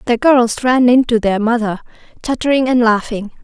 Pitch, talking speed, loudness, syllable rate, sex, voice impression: 235 Hz, 175 wpm, -14 LUFS, 5.2 syllables/s, female, very feminine, young, very thin, tensed, slightly powerful, bright, slightly hard, very clear, fluent, very cute, slightly intellectual, refreshing, slightly sincere, slightly calm, very friendly, reassuring, unique, very elegant, sweet, slightly lively, kind